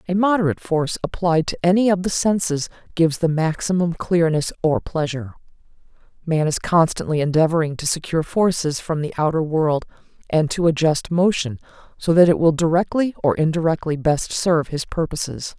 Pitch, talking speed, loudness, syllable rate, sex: 165 Hz, 160 wpm, -20 LUFS, 5.6 syllables/s, female